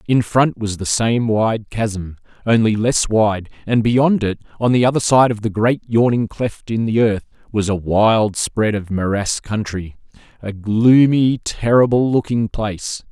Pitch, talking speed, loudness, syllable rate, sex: 110 Hz, 165 wpm, -17 LUFS, 4.1 syllables/s, male